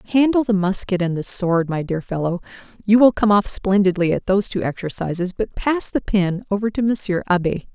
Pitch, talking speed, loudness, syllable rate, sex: 195 Hz, 200 wpm, -19 LUFS, 5.5 syllables/s, female